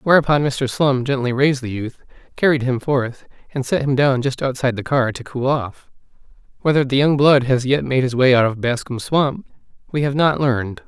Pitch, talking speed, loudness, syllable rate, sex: 130 Hz, 210 wpm, -18 LUFS, 5.3 syllables/s, male